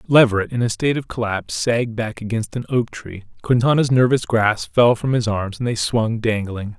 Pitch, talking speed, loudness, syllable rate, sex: 115 Hz, 205 wpm, -19 LUFS, 5.3 syllables/s, male